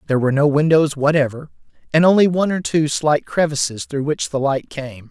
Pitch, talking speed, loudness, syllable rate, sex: 145 Hz, 200 wpm, -17 LUFS, 5.8 syllables/s, male